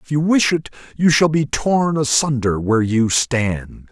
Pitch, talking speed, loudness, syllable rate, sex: 140 Hz, 185 wpm, -17 LUFS, 4.3 syllables/s, male